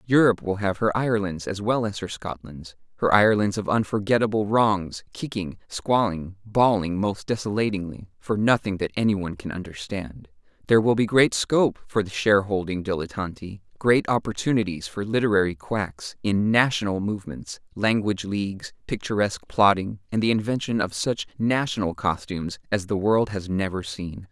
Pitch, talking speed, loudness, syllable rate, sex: 100 Hz, 150 wpm, -24 LUFS, 5.2 syllables/s, male